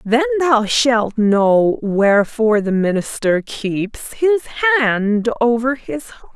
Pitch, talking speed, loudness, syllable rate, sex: 235 Hz, 125 wpm, -16 LUFS, 3.4 syllables/s, female